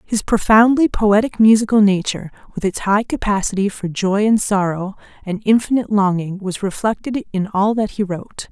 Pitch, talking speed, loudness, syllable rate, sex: 205 Hz, 160 wpm, -17 LUFS, 5.2 syllables/s, female